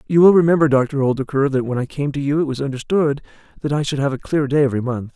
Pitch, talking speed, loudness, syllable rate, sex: 140 Hz, 270 wpm, -18 LUFS, 6.8 syllables/s, male